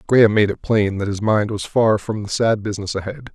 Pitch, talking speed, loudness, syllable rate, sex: 105 Hz, 250 wpm, -19 LUFS, 5.6 syllables/s, male